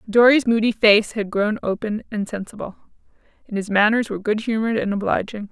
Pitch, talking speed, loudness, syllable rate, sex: 215 Hz, 175 wpm, -20 LUFS, 5.9 syllables/s, female